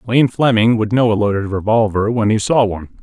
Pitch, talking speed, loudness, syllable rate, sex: 110 Hz, 220 wpm, -15 LUFS, 5.8 syllables/s, male